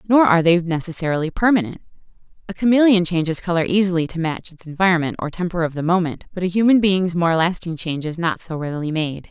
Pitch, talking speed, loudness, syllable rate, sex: 175 Hz, 200 wpm, -19 LUFS, 6.5 syllables/s, female